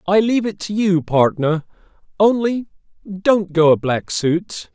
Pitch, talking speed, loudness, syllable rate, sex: 180 Hz, 150 wpm, -18 LUFS, 4.1 syllables/s, male